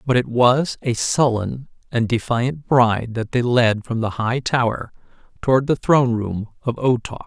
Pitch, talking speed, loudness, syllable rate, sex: 120 Hz, 180 wpm, -19 LUFS, 4.5 syllables/s, male